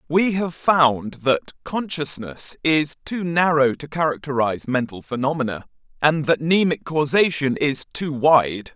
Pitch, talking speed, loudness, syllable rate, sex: 145 Hz, 130 wpm, -21 LUFS, 4.2 syllables/s, male